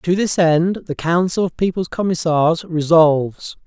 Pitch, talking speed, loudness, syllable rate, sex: 170 Hz, 145 wpm, -17 LUFS, 4.2 syllables/s, male